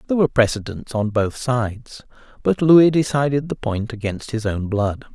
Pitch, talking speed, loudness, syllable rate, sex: 120 Hz, 175 wpm, -20 LUFS, 5.3 syllables/s, male